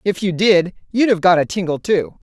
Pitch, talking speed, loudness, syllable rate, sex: 185 Hz, 205 wpm, -17 LUFS, 5.1 syllables/s, female